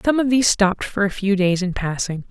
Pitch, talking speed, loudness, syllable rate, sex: 200 Hz, 260 wpm, -19 LUFS, 6.0 syllables/s, female